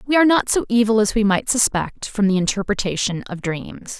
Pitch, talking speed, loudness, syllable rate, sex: 215 Hz, 210 wpm, -19 LUFS, 5.6 syllables/s, female